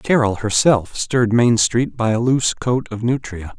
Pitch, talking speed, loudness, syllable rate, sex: 120 Hz, 185 wpm, -18 LUFS, 4.6 syllables/s, male